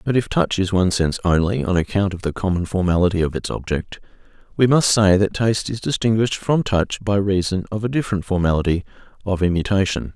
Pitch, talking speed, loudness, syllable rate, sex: 95 Hz, 195 wpm, -19 LUFS, 6.1 syllables/s, male